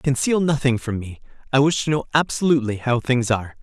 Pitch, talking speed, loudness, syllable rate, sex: 130 Hz, 200 wpm, -20 LUFS, 6.0 syllables/s, male